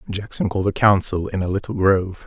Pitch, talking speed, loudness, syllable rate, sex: 95 Hz, 210 wpm, -20 LUFS, 6.3 syllables/s, male